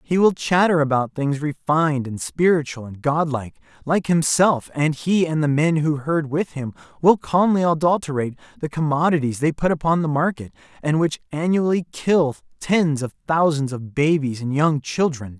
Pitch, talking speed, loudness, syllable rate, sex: 150 Hz, 170 wpm, -20 LUFS, 4.9 syllables/s, male